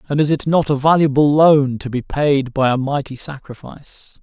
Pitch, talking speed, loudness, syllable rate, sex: 140 Hz, 200 wpm, -16 LUFS, 4.9 syllables/s, male